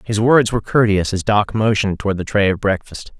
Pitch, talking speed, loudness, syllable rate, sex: 105 Hz, 225 wpm, -17 LUFS, 5.9 syllables/s, male